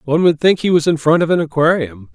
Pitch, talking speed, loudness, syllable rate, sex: 160 Hz, 280 wpm, -14 LUFS, 6.5 syllables/s, male